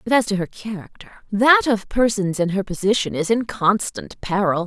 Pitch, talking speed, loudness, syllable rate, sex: 205 Hz, 195 wpm, -20 LUFS, 5.0 syllables/s, female